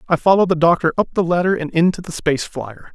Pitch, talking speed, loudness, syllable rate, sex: 165 Hz, 245 wpm, -17 LUFS, 6.8 syllables/s, male